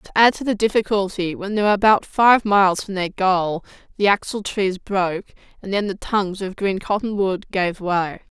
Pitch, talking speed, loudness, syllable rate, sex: 195 Hz, 195 wpm, -20 LUFS, 5.1 syllables/s, female